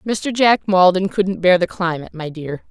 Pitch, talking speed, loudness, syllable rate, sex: 185 Hz, 200 wpm, -17 LUFS, 4.8 syllables/s, female